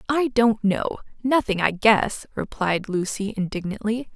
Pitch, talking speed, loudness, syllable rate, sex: 215 Hz, 130 wpm, -23 LUFS, 4.1 syllables/s, female